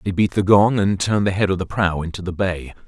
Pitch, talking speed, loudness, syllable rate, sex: 95 Hz, 295 wpm, -19 LUFS, 6.0 syllables/s, male